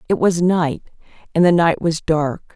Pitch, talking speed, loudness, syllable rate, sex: 165 Hz, 190 wpm, -17 LUFS, 4.1 syllables/s, female